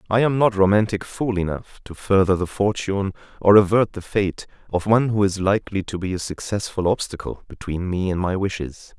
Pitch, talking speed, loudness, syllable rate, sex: 100 Hz, 195 wpm, -21 LUFS, 5.5 syllables/s, male